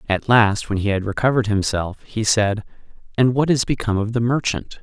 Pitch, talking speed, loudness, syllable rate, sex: 110 Hz, 200 wpm, -19 LUFS, 5.7 syllables/s, male